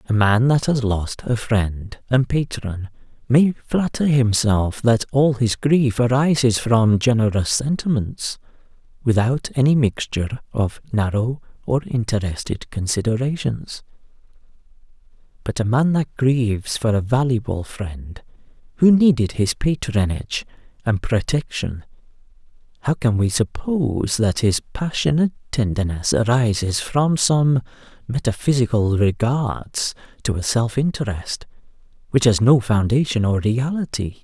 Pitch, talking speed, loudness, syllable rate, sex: 120 Hz, 115 wpm, -20 LUFS, 4.2 syllables/s, male